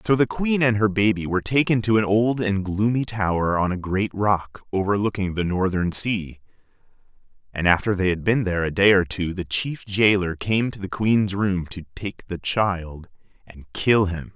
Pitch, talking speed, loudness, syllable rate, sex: 100 Hz, 195 wpm, -22 LUFS, 4.7 syllables/s, male